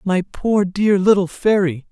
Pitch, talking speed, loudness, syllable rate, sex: 190 Hz, 155 wpm, -17 LUFS, 3.9 syllables/s, male